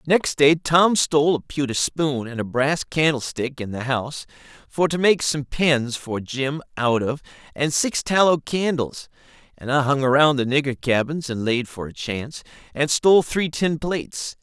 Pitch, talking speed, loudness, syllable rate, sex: 140 Hz, 185 wpm, -21 LUFS, 4.5 syllables/s, male